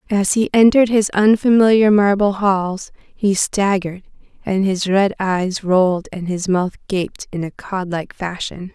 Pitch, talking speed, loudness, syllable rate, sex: 195 Hz, 160 wpm, -17 LUFS, 4.2 syllables/s, female